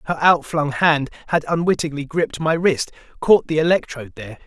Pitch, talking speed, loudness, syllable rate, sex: 155 Hz, 160 wpm, -19 LUFS, 5.7 syllables/s, male